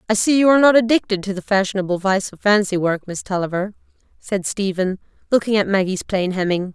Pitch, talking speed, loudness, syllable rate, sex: 200 Hz, 195 wpm, -19 LUFS, 6.0 syllables/s, female